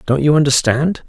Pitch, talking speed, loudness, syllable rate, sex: 135 Hz, 165 wpm, -14 LUFS, 5.3 syllables/s, male